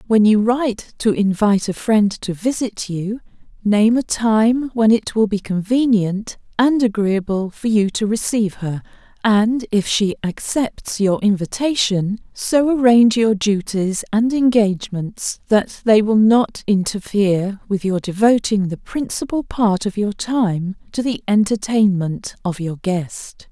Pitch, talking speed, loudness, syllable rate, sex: 210 Hz, 145 wpm, -18 LUFS, 4.1 syllables/s, female